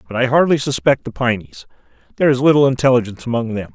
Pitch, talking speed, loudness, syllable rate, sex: 120 Hz, 190 wpm, -16 LUFS, 7.2 syllables/s, male